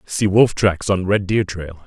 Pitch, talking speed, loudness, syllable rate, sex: 95 Hz, 225 wpm, -18 LUFS, 4.0 syllables/s, male